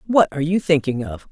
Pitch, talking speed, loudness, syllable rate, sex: 155 Hz, 230 wpm, -19 LUFS, 6.3 syllables/s, female